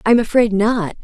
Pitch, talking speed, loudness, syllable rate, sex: 220 Hz, 175 wpm, -16 LUFS, 4.5 syllables/s, female